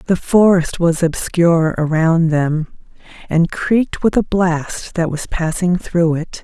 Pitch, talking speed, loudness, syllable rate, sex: 170 Hz, 150 wpm, -16 LUFS, 3.9 syllables/s, female